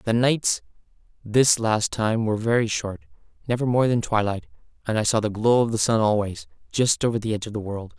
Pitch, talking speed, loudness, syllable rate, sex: 110 Hz, 210 wpm, -23 LUFS, 5.6 syllables/s, male